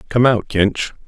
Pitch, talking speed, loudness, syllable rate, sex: 110 Hz, 165 wpm, -17 LUFS, 3.8 syllables/s, male